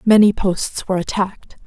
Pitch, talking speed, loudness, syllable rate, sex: 195 Hz, 145 wpm, -18 LUFS, 5.4 syllables/s, female